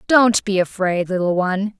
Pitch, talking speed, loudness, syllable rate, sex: 195 Hz, 165 wpm, -18 LUFS, 4.9 syllables/s, female